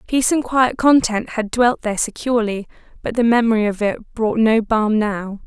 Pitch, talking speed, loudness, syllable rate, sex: 225 Hz, 185 wpm, -18 LUFS, 5.1 syllables/s, female